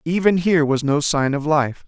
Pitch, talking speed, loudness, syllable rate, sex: 155 Hz, 225 wpm, -18 LUFS, 5.1 syllables/s, male